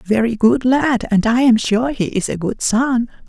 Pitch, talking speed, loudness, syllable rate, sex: 230 Hz, 240 wpm, -16 LUFS, 4.7 syllables/s, male